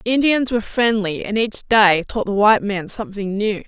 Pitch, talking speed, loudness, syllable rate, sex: 210 Hz, 215 wpm, -18 LUFS, 5.7 syllables/s, female